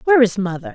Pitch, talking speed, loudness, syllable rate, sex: 225 Hz, 240 wpm, -17 LUFS, 7.9 syllables/s, female